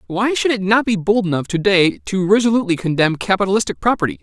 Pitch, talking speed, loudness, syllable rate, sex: 200 Hz, 200 wpm, -17 LUFS, 6.4 syllables/s, male